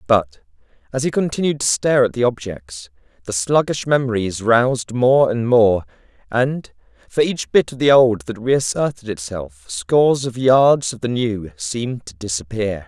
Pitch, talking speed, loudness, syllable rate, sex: 120 Hz, 165 wpm, -18 LUFS, 4.5 syllables/s, male